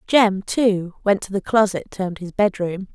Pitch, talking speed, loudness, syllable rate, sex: 195 Hz, 205 wpm, -20 LUFS, 4.6 syllables/s, female